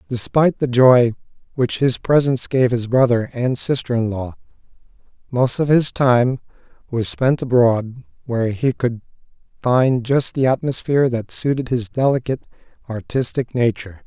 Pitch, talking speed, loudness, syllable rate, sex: 125 Hz, 140 wpm, -18 LUFS, 4.8 syllables/s, male